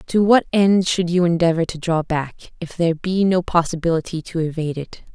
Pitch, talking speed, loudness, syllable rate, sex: 170 Hz, 200 wpm, -19 LUFS, 5.4 syllables/s, female